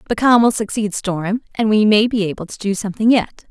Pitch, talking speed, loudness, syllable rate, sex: 210 Hz, 240 wpm, -17 LUFS, 5.6 syllables/s, female